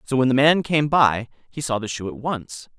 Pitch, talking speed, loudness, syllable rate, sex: 130 Hz, 260 wpm, -21 LUFS, 5.0 syllables/s, male